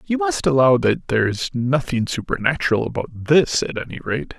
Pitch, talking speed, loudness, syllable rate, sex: 125 Hz, 180 wpm, -20 LUFS, 5.2 syllables/s, male